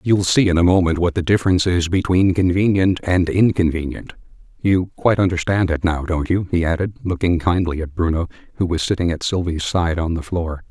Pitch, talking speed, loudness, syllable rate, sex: 90 Hz, 195 wpm, -18 LUFS, 5.6 syllables/s, male